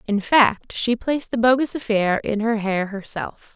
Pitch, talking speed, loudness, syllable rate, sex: 225 Hz, 185 wpm, -21 LUFS, 4.4 syllables/s, female